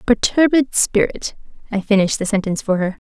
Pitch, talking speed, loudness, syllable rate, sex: 215 Hz, 155 wpm, -17 LUFS, 5.8 syllables/s, female